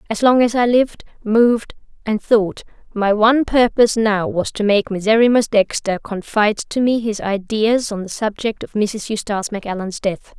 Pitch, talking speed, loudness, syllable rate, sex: 215 Hz, 175 wpm, -17 LUFS, 5.0 syllables/s, female